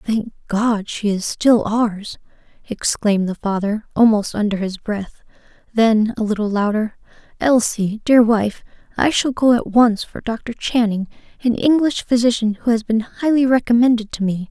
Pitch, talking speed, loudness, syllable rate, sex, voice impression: 225 Hz, 155 wpm, -18 LUFS, 4.5 syllables/s, female, very feminine, slightly young, very thin, slightly tensed, weak, dark, soft, clear, slightly fluent, very cute, intellectual, refreshing, sincere, calm, very friendly, reassuring, very unique, very elegant, slightly wild, very sweet, lively, kind, sharp, slightly modest, light